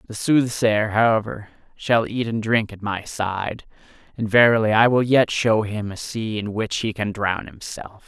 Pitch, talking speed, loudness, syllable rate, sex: 110 Hz, 185 wpm, -20 LUFS, 4.4 syllables/s, male